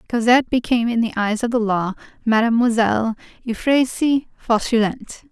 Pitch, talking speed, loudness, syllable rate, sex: 235 Hz, 125 wpm, -19 LUFS, 5.9 syllables/s, female